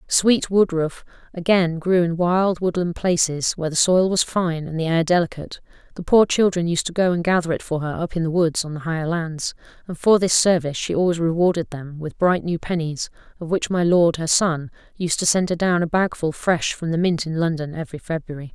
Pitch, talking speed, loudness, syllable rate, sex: 170 Hz, 225 wpm, -20 LUFS, 5.5 syllables/s, female